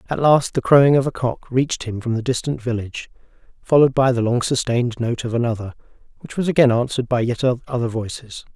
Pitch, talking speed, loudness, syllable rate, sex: 125 Hz, 205 wpm, -19 LUFS, 6.2 syllables/s, male